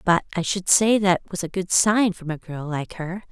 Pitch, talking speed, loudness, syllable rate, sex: 180 Hz, 255 wpm, -22 LUFS, 4.8 syllables/s, female